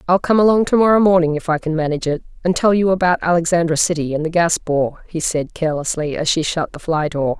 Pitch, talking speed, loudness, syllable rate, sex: 165 Hz, 245 wpm, -17 LUFS, 6.2 syllables/s, female